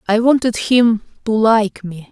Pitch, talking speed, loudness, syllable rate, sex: 220 Hz, 170 wpm, -15 LUFS, 4.0 syllables/s, female